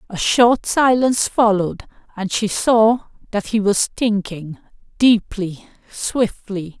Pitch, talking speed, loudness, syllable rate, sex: 210 Hz, 115 wpm, -18 LUFS, 3.7 syllables/s, female